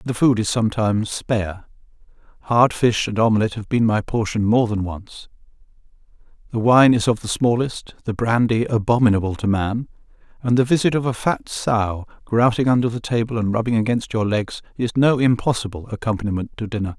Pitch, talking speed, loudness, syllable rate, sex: 115 Hz, 175 wpm, -20 LUFS, 5.5 syllables/s, male